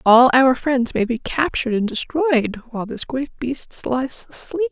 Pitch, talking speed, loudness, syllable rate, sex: 260 Hz, 180 wpm, -20 LUFS, 4.4 syllables/s, female